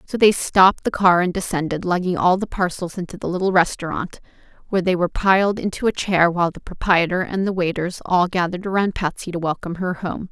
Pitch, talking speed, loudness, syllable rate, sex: 180 Hz, 210 wpm, -20 LUFS, 6.1 syllables/s, female